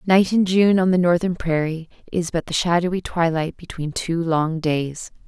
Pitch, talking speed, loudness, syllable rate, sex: 170 Hz, 180 wpm, -20 LUFS, 4.6 syllables/s, female